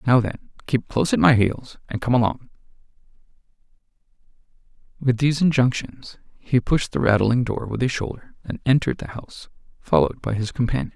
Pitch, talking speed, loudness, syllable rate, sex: 115 Hz, 160 wpm, -21 LUFS, 5.7 syllables/s, male